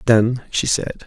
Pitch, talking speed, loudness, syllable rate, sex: 115 Hz, 170 wpm, -19 LUFS, 3.5 syllables/s, male